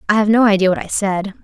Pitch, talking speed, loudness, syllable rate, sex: 205 Hz, 290 wpm, -15 LUFS, 6.8 syllables/s, female